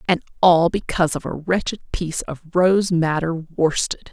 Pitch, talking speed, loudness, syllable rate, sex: 170 Hz, 160 wpm, -20 LUFS, 4.7 syllables/s, female